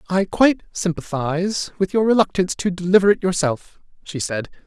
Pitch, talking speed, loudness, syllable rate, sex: 180 Hz, 155 wpm, -20 LUFS, 5.6 syllables/s, male